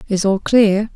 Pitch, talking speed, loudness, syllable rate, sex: 205 Hz, 190 wpm, -15 LUFS, 4.0 syllables/s, female